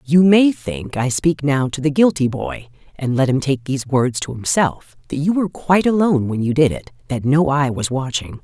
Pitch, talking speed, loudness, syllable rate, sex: 140 Hz, 215 wpm, -18 LUFS, 5.1 syllables/s, female